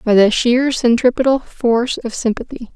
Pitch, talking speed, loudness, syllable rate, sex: 240 Hz, 150 wpm, -16 LUFS, 5.0 syllables/s, female